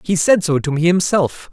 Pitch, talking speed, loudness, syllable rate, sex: 170 Hz, 235 wpm, -16 LUFS, 5.0 syllables/s, male